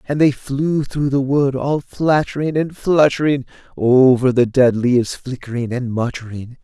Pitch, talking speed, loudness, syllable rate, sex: 135 Hz, 155 wpm, -17 LUFS, 4.4 syllables/s, male